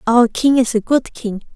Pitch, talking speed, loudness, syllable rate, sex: 240 Hz, 230 wpm, -16 LUFS, 4.5 syllables/s, female